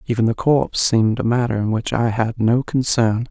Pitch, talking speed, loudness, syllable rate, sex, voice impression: 115 Hz, 220 wpm, -18 LUFS, 5.5 syllables/s, male, very masculine, very adult-like, slightly middle-aged, very thick, very relaxed, very weak, very dark, very soft, very muffled, slightly fluent, raspy, cool, very intellectual, slightly refreshing, sincere, very calm, slightly friendly, very reassuring, slightly unique, elegant, wild, sweet, kind, very modest